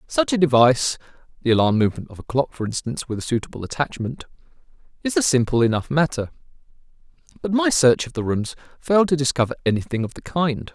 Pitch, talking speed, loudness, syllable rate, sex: 135 Hz, 175 wpm, -21 LUFS, 6.6 syllables/s, male